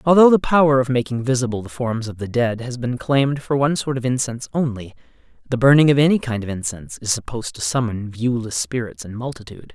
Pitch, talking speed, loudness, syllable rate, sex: 125 Hz, 215 wpm, -20 LUFS, 6.3 syllables/s, male